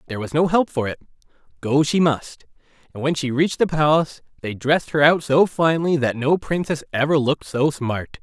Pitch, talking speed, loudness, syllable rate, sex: 145 Hz, 205 wpm, -20 LUFS, 5.7 syllables/s, male